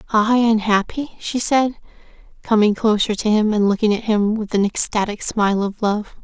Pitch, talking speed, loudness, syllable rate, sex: 215 Hz, 175 wpm, -18 LUFS, 5.0 syllables/s, female